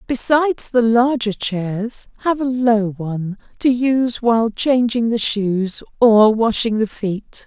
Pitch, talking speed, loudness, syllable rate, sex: 230 Hz, 145 wpm, -17 LUFS, 3.8 syllables/s, female